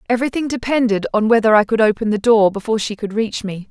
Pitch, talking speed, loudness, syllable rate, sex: 220 Hz, 225 wpm, -17 LUFS, 6.7 syllables/s, female